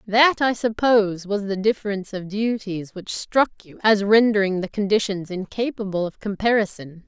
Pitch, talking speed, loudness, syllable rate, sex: 205 Hz, 155 wpm, -21 LUFS, 5.0 syllables/s, female